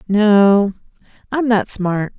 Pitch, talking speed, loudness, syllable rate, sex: 205 Hz, 110 wpm, -15 LUFS, 2.8 syllables/s, female